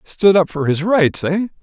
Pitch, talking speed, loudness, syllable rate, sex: 175 Hz, 220 wpm, -16 LUFS, 4.3 syllables/s, male